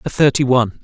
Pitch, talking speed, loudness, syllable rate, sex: 130 Hz, 215 wpm, -15 LUFS, 6.9 syllables/s, male